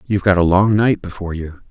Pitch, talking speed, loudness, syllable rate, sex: 95 Hz, 245 wpm, -16 LUFS, 6.5 syllables/s, male